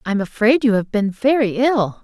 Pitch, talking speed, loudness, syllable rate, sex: 230 Hz, 235 wpm, -17 LUFS, 5.2 syllables/s, female